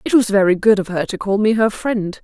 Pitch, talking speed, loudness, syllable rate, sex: 205 Hz, 295 wpm, -16 LUFS, 5.6 syllables/s, female